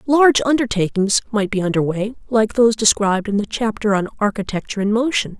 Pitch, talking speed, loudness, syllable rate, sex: 215 Hz, 180 wpm, -18 LUFS, 6.1 syllables/s, female